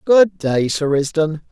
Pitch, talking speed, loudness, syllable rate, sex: 160 Hz, 160 wpm, -17 LUFS, 3.7 syllables/s, male